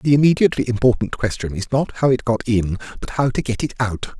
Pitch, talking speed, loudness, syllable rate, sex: 120 Hz, 230 wpm, -19 LUFS, 6.1 syllables/s, male